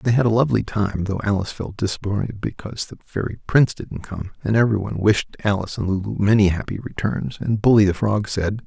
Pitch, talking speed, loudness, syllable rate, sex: 105 Hz, 200 wpm, -21 LUFS, 6.2 syllables/s, male